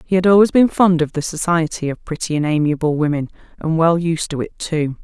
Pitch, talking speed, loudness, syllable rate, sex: 160 Hz, 225 wpm, -17 LUFS, 5.6 syllables/s, female